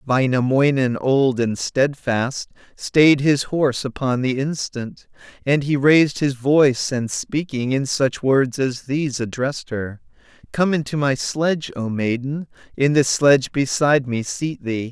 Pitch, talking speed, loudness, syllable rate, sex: 135 Hz, 150 wpm, -19 LUFS, 4.2 syllables/s, male